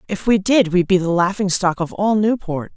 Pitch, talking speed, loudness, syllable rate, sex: 190 Hz, 240 wpm, -17 LUFS, 5.1 syllables/s, female